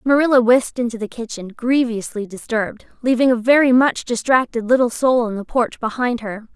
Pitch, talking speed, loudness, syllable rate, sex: 240 Hz, 175 wpm, -18 LUFS, 5.5 syllables/s, female